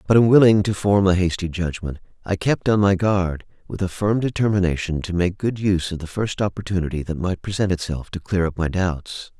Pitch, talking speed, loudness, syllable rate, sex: 95 Hz, 210 wpm, -21 LUFS, 5.5 syllables/s, male